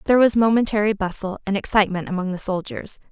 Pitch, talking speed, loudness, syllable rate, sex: 200 Hz, 175 wpm, -20 LUFS, 6.8 syllables/s, female